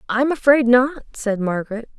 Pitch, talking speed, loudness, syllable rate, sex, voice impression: 245 Hz, 150 wpm, -18 LUFS, 5.0 syllables/s, female, feminine, adult-like, slightly soft, slightly intellectual, slightly calm